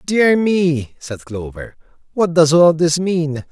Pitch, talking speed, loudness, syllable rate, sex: 160 Hz, 155 wpm, -15 LUFS, 3.4 syllables/s, male